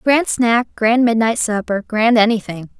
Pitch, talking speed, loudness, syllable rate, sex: 225 Hz, 150 wpm, -16 LUFS, 4.1 syllables/s, female